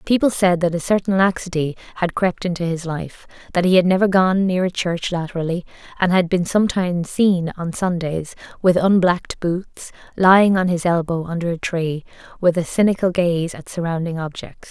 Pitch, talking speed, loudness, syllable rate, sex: 175 Hz, 180 wpm, -19 LUFS, 5.1 syllables/s, female